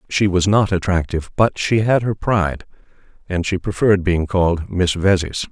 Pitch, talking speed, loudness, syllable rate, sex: 95 Hz, 175 wpm, -18 LUFS, 5.3 syllables/s, male